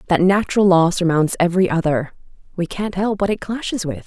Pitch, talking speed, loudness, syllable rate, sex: 185 Hz, 190 wpm, -18 LUFS, 5.9 syllables/s, female